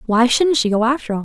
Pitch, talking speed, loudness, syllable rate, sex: 245 Hz, 290 wpm, -16 LUFS, 6.4 syllables/s, female